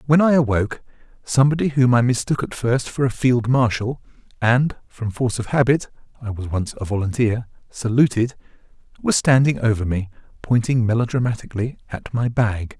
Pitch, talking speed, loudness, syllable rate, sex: 120 Hz, 145 wpm, -20 LUFS, 5.5 syllables/s, male